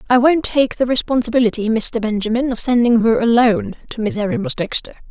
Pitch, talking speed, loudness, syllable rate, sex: 230 Hz, 165 wpm, -17 LUFS, 6.0 syllables/s, female